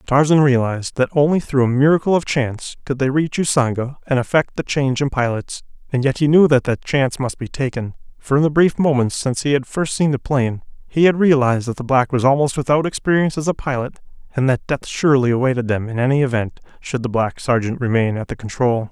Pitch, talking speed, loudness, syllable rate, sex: 135 Hz, 225 wpm, -18 LUFS, 6.1 syllables/s, male